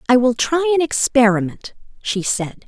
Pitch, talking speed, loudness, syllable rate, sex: 250 Hz, 155 wpm, -17 LUFS, 4.8 syllables/s, female